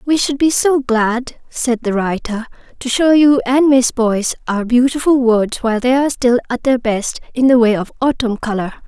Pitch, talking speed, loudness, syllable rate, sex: 245 Hz, 205 wpm, -15 LUFS, 4.9 syllables/s, female